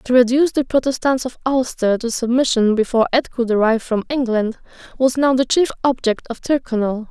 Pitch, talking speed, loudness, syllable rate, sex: 245 Hz, 175 wpm, -18 LUFS, 5.7 syllables/s, female